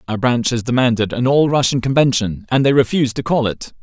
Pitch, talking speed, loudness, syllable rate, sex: 125 Hz, 220 wpm, -16 LUFS, 5.9 syllables/s, male